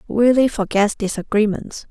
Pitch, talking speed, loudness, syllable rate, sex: 215 Hz, 95 wpm, -18 LUFS, 4.7 syllables/s, female